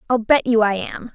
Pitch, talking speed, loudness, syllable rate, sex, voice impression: 230 Hz, 260 wpm, -18 LUFS, 5.2 syllables/s, female, feminine, adult-like, tensed, powerful, slightly bright, slightly soft, clear, slightly intellectual, friendly, lively, slightly sharp